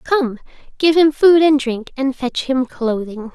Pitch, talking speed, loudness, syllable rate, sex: 270 Hz, 180 wpm, -16 LUFS, 3.9 syllables/s, female